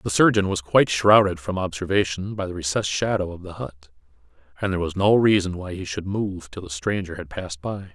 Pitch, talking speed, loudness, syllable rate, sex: 90 Hz, 220 wpm, -22 LUFS, 5.9 syllables/s, male